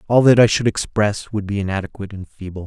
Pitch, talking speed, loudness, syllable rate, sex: 105 Hz, 225 wpm, -17 LUFS, 6.4 syllables/s, male